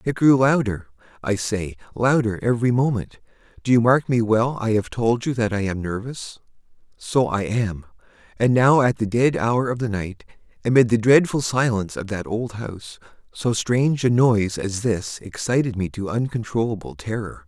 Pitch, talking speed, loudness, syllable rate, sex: 115 Hz, 175 wpm, -21 LUFS, 4.9 syllables/s, male